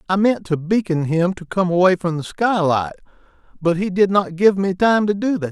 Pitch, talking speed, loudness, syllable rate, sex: 185 Hz, 230 wpm, -18 LUFS, 5.1 syllables/s, male